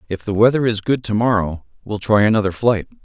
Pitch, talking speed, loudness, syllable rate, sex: 110 Hz, 215 wpm, -17 LUFS, 5.9 syllables/s, male